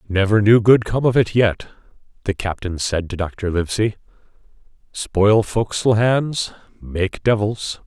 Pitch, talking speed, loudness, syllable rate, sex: 105 Hz, 135 wpm, -18 LUFS, 4.4 syllables/s, male